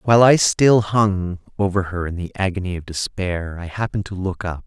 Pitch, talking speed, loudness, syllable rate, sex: 95 Hz, 205 wpm, -20 LUFS, 5.3 syllables/s, male